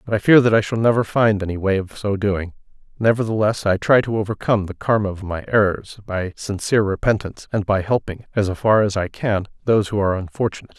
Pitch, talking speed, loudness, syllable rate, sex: 105 Hz, 210 wpm, -19 LUFS, 6.1 syllables/s, male